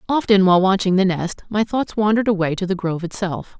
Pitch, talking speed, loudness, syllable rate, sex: 195 Hz, 215 wpm, -19 LUFS, 6.3 syllables/s, female